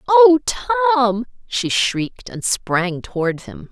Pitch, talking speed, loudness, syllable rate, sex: 245 Hz, 130 wpm, -18 LUFS, 3.6 syllables/s, female